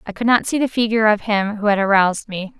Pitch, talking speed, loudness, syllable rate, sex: 210 Hz, 280 wpm, -17 LUFS, 6.6 syllables/s, female